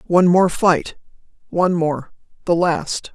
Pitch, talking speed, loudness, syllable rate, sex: 170 Hz, 115 wpm, -18 LUFS, 4.2 syllables/s, female